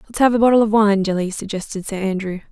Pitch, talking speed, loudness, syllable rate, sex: 205 Hz, 240 wpm, -18 LUFS, 7.4 syllables/s, female